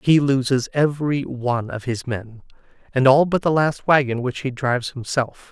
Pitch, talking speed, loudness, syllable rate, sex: 130 Hz, 185 wpm, -20 LUFS, 4.9 syllables/s, male